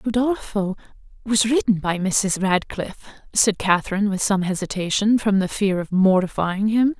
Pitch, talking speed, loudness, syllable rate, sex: 200 Hz, 145 wpm, -20 LUFS, 4.9 syllables/s, female